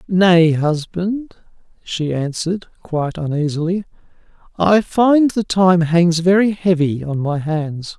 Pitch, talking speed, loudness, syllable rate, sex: 175 Hz, 120 wpm, -17 LUFS, 3.9 syllables/s, male